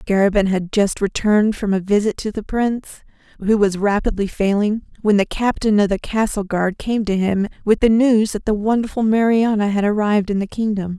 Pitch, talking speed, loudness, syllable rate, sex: 210 Hz, 195 wpm, -18 LUFS, 5.4 syllables/s, female